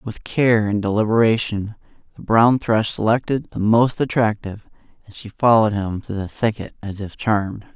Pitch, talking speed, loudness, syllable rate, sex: 110 Hz, 160 wpm, -19 LUFS, 4.9 syllables/s, male